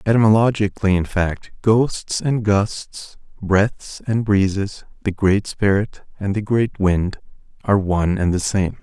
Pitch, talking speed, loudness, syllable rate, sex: 100 Hz, 145 wpm, -19 LUFS, 4.1 syllables/s, male